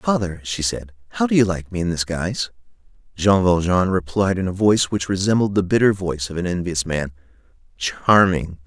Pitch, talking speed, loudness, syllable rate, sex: 90 Hz, 185 wpm, -20 LUFS, 5.4 syllables/s, male